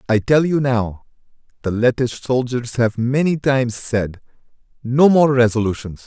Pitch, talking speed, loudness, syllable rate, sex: 125 Hz, 140 wpm, -18 LUFS, 4.5 syllables/s, male